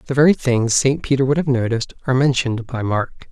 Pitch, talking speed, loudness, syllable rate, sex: 125 Hz, 215 wpm, -18 LUFS, 6.0 syllables/s, male